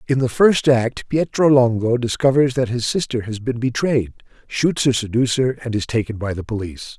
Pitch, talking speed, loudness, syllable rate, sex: 125 Hz, 190 wpm, -19 LUFS, 5.1 syllables/s, male